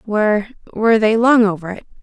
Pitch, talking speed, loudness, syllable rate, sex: 215 Hz, 150 wpm, -15 LUFS, 6.0 syllables/s, female